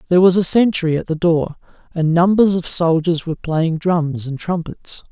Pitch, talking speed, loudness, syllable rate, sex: 170 Hz, 190 wpm, -17 LUFS, 4.9 syllables/s, male